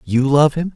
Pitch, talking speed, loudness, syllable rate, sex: 145 Hz, 240 wpm, -15 LUFS, 4.6 syllables/s, male